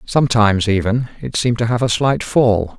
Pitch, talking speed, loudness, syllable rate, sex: 115 Hz, 195 wpm, -16 LUFS, 5.4 syllables/s, male